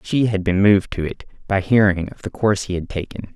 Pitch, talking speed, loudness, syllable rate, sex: 100 Hz, 250 wpm, -19 LUFS, 6.0 syllables/s, male